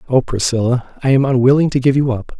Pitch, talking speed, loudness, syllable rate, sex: 130 Hz, 225 wpm, -15 LUFS, 6.2 syllables/s, male